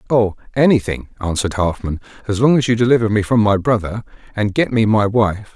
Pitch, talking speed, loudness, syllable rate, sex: 110 Hz, 195 wpm, -17 LUFS, 5.8 syllables/s, male